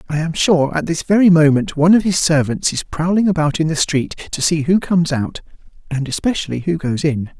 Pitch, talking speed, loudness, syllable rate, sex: 160 Hz, 220 wpm, -16 LUFS, 5.6 syllables/s, male